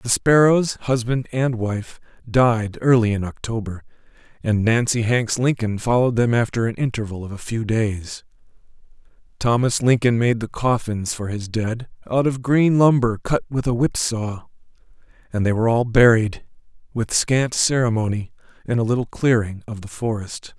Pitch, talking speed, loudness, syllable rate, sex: 115 Hz, 155 wpm, -20 LUFS, 4.7 syllables/s, male